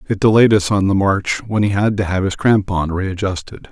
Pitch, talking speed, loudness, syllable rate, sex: 100 Hz, 225 wpm, -16 LUFS, 5.1 syllables/s, male